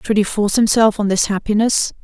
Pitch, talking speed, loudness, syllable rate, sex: 210 Hz, 205 wpm, -16 LUFS, 5.9 syllables/s, female